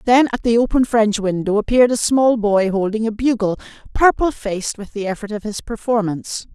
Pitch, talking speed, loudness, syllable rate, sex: 220 Hz, 195 wpm, -18 LUFS, 5.5 syllables/s, female